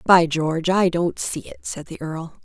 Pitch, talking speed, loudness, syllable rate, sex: 165 Hz, 220 wpm, -22 LUFS, 4.7 syllables/s, female